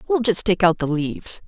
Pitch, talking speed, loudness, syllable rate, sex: 195 Hz, 245 wpm, -19 LUFS, 5.5 syllables/s, female